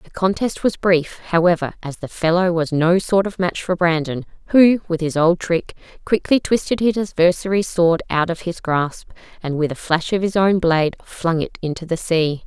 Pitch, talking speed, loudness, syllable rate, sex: 175 Hz, 200 wpm, -19 LUFS, 4.9 syllables/s, female